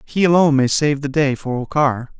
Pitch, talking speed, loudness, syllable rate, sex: 140 Hz, 220 wpm, -17 LUFS, 5.4 syllables/s, male